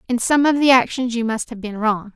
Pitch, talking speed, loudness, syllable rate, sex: 235 Hz, 280 wpm, -18 LUFS, 5.6 syllables/s, female